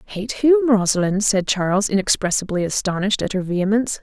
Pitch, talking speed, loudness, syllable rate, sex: 205 Hz, 150 wpm, -19 LUFS, 5.9 syllables/s, female